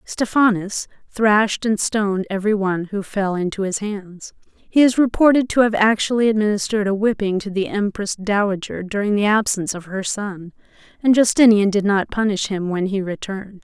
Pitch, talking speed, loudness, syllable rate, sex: 205 Hz, 170 wpm, -19 LUFS, 5.3 syllables/s, female